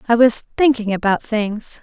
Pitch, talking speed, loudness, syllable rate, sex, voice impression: 225 Hz, 165 wpm, -17 LUFS, 4.6 syllables/s, female, very feminine, young, slightly thin, tensed, very powerful, slightly bright, slightly hard, clear, fluent, cute, slightly intellectual, refreshing, sincere, calm, friendly, slightly reassuring, very unique, elegant, slightly wild, sweet, lively, strict, slightly intense, slightly sharp, slightly light